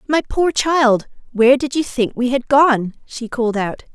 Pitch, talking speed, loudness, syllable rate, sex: 255 Hz, 200 wpm, -17 LUFS, 4.6 syllables/s, female